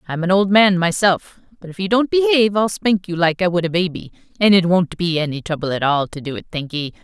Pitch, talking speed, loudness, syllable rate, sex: 180 Hz, 255 wpm, -17 LUFS, 5.9 syllables/s, female